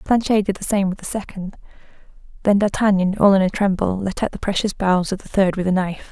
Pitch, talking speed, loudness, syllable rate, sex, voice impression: 195 Hz, 235 wpm, -19 LUFS, 6.2 syllables/s, female, very feminine, young, adult-like, very thin, very relaxed, very weak, dark, very soft, slightly muffled, very fluent, raspy, very cute, very intellectual, refreshing, sincere, very calm, very friendly, very reassuring, very unique, very elegant, slightly wild, very sweet, slightly lively, slightly sharp, very modest, very light